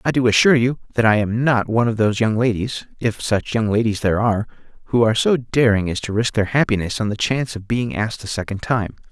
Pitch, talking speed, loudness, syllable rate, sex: 115 Hz, 245 wpm, -19 LUFS, 5.6 syllables/s, male